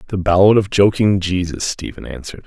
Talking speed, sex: 170 wpm, male